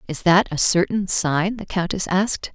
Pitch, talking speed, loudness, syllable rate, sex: 185 Hz, 190 wpm, -20 LUFS, 4.7 syllables/s, female